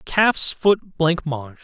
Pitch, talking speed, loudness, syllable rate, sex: 165 Hz, 110 wpm, -20 LUFS, 3.3 syllables/s, male